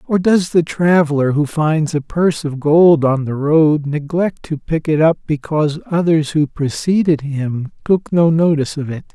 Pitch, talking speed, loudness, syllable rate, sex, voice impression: 155 Hz, 185 wpm, -16 LUFS, 4.5 syllables/s, male, masculine, adult-like, soft, calm, friendly, reassuring, kind